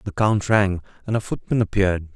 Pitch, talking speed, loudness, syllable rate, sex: 100 Hz, 195 wpm, -22 LUFS, 5.9 syllables/s, male